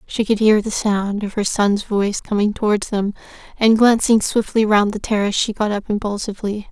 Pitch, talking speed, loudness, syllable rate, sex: 210 Hz, 195 wpm, -18 LUFS, 5.4 syllables/s, female